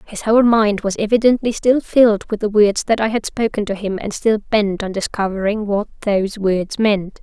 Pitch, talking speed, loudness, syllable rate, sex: 210 Hz, 210 wpm, -17 LUFS, 5.0 syllables/s, female